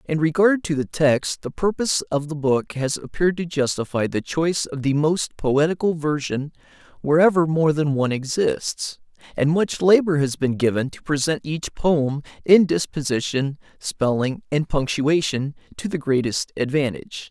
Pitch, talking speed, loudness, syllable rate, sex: 150 Hz, 155 wpm, -21 LUFS, 4.7 syllables/s, male